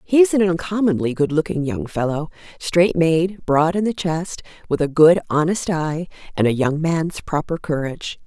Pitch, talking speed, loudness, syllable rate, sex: 165 Hz, 180 wpm, -19 LUFS, 4.7 syllables/s, female